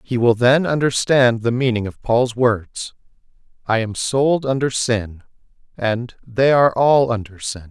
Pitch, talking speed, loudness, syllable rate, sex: 120 Hz, 155 wpm, -18 LUFS, 4.1 syllables/s, male